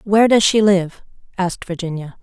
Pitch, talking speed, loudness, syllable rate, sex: 190 Hz, 160 wpm, -17 LUFS, 5.7 syllables/s, female